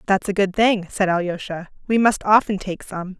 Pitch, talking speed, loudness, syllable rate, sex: 195 Hz, 205 wpm, -20 LUFS, 4.9 syllables/s, female